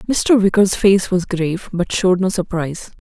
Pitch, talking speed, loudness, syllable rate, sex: 190 Hz, 180 wpm, -16 LUFS, 5.2 syllables/s, female